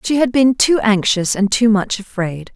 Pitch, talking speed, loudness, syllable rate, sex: 215 Hz, 210 wpm, -15 LUFS, 4.6 syllables/s, female